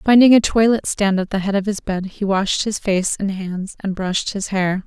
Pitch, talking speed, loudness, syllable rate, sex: 200 Hz, 245 wpm, -18 LUFS, 4.9 syllables/s, female